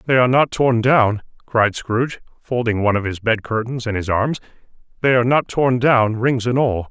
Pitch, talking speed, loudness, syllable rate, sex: 120 Hz, 210 wpm, -18 LUFS, 5.3 syllables/s, male